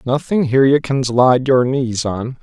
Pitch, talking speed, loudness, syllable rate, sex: 130 Hz, 200 wpm, -15 LUFS, 4.8 syllables/s, male